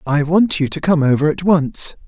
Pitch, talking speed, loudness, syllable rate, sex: 160 Hz, 230 wpm, -16 LUFS, 4.8 syllables/s, male